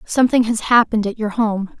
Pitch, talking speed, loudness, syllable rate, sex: 220 Hz, 200 wpm, -17 LUFS, 6.0 syllables/s, female